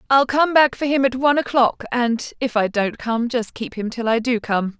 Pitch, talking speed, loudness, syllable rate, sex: 240 Hz, 250 wpm, -19 LUFS, 4.9 syllables/s, female